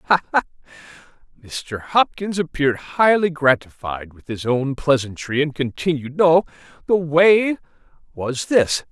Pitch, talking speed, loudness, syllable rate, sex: 150 Hz, 115 wpm, -19 LUFS, 4.1 syllables/s, male